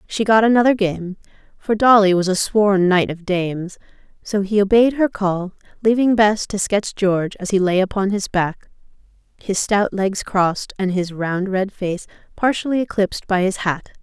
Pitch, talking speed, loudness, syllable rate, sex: 200 Hz, 180 wpm, -18 LUFS, 4.8 syllables/s, female